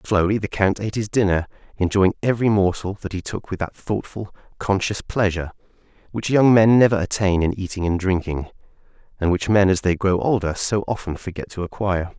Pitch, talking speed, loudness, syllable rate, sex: 100 Hz, 185 wpm, -21 LUFS, 5.8 syllables/s, male